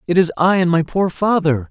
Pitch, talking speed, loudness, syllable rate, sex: 170 Hz, 245 wpm, -16 LUFS, 5.3 syllables/s, male